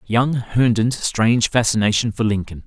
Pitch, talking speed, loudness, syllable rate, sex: 110 Hz, 135 wpm, -18 LUFS, 4.7 syllables/s, male